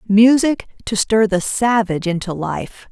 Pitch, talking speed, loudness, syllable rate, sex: 210 Hz, 145 wpm, -17 LUFS, 4.3 syllables/s, female